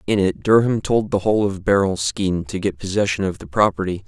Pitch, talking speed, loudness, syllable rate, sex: 100 Hz, 220 wpm, -19 LUFS, 5.9 syllables/s, male